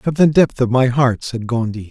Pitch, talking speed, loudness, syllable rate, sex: 125 Hz, 250 wpm, -16 LUFS, 4.8 syllables/s, male